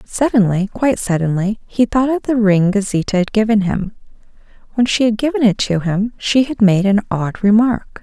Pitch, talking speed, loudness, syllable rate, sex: 215 Hz, 185 wpm, -16 LUFS, 5.1 syllables/s, female